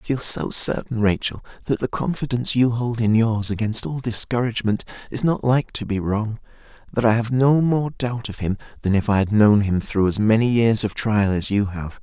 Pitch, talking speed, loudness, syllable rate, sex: 115 Hz, 220 wpm, -21 LUFS, 5.2 syllables/s, male